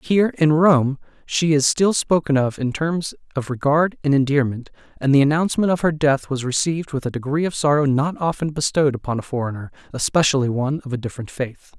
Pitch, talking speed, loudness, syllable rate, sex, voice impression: 145 Hz, 200 wpm, -20 LUFS, 5.9 syllables/s, male, masculine, adult-like, tensed, powerful, slightly muffled, fluent, slightly raspy, intellectual, slightly refreshing, friendly, lively, kind, slightly light